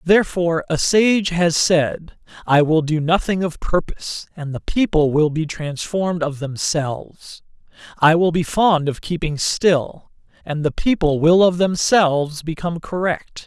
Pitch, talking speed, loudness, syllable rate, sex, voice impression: 165 Hz, 150 wpm, -18 LUFS, 4.2 syllables/s, male, very masculine, very middle-aged, very thick, tensed, powerful, very bright, soft, very clear, fluent, slightly raspy, cool, intellectual, very refreshing, sincere, calm, slightly mature, very friendly, very reassuring, very unique, slightly elegant, very wild, sweet, very lively, kind, intense